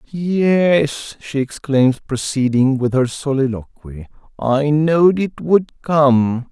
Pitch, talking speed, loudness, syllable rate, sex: 140 Hz, 110 wpm, -17 LUFS, 3.2 syllables/s, male